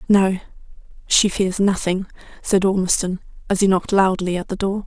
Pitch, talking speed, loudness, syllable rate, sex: 190 Hz, 160 wpm, -19 LUFS, 5.3 syllables/s, female